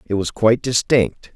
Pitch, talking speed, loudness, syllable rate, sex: 110 Hz, 180 wpm, -18 LUFS, 4.9 syllables/s, male